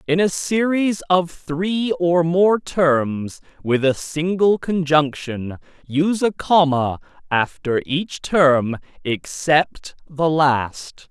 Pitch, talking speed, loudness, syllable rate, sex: 160 Hz, 115 wpm, -19 LUFS, 3.0 syllables/s, male